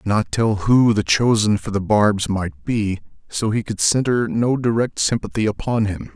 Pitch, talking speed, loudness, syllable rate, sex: 110 Hz, 205 wpm, -19 LUFS, 4.7 syllables/s, male